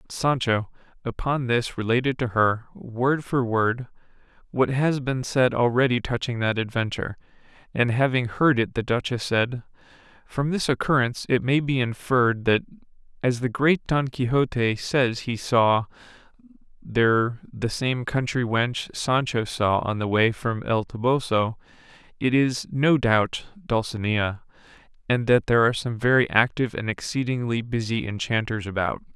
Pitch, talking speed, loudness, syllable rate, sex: 120 Hz, 145 wpm, -23 LUFS, 4.6 syllables/s, male